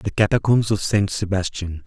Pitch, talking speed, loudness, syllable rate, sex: 100 Hz, 160 wpm, -20 LUFS, 4.9 syllables/s, male